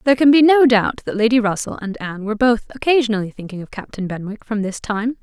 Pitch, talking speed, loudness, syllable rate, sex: 225 Hz, 230 wpm, -17 LUFS, 6.4 syllables/s, female